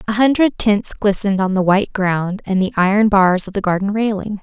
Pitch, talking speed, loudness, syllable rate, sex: 200 Hz, 215 wpm, -16 LUFS, 5.5 syllables/s, female